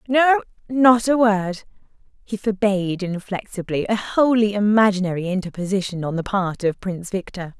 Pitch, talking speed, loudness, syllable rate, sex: 200 Hz, 135 wpm, -20 LUFS, 5.1 syllables/s, female